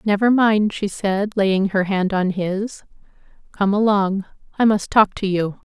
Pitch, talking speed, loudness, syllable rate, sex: 200 Hz, 170 wpm, -19 LUFS, 4.0 syllables/s, female